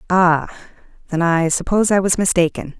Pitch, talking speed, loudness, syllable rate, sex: 175 Hz, 150 wpm, -17 LUFS, 5.6 syllables/s, female